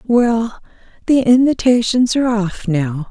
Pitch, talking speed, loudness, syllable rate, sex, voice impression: 225 Hz, 115 wpm, -15 LUFS, 4.0 syllables/s, female, feminine, middle-aged, tensed, powerful, bright, soft, fluent, slightly raspy, intellectual, calm, elegant, lively, strict, slightly sharp